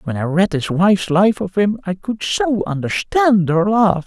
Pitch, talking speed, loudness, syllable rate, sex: 195 Hz, 205 wpm, -17 LUFS, 4.4 syllables/s, male